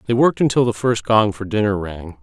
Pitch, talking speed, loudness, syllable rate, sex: 110 Hz, 245 wpm, -18 LUFS, 5.9 syllables/s, male